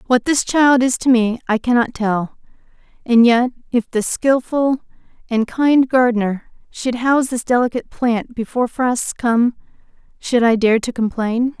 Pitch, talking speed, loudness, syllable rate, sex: 240 Hz, 155 wpm, -17 LUFS, 4.5 syllables/s, female